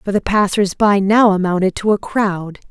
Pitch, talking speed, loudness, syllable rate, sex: 200 Hz, 200 wpm, -15 LUFS, 4.8 syllables/s, female